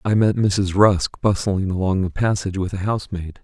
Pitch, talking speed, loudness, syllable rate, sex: 95 Hz, 190 wpm, -20 LUFS, 5.2 syllables/s, male